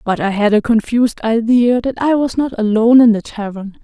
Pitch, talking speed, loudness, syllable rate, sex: 230 Hz, 220 wpm, -14 LUFS, 5.4 syllables/s, female